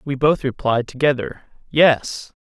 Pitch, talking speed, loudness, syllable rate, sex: 135 Hz, 125 wpm, -18 LUFS, 4.0 syllables/s, male